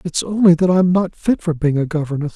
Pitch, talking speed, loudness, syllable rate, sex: 165 Hz, 255 wpm, -16 LUFS, 5.8 syllables/s, male